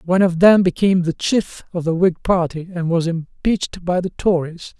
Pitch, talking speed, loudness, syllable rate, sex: 175 Hz, 200 wpm, -18 LUFS, 5.2 syllables/s, male